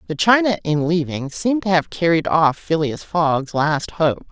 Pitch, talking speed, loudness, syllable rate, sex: 165 Hz, 180 wpm, -19 LUFS, 4.4 syllables/s, female